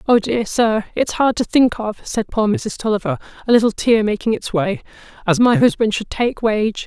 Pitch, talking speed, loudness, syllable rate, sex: 225 Hz, 210 wpm, -18 LUFS, 5.0 syllables/s, female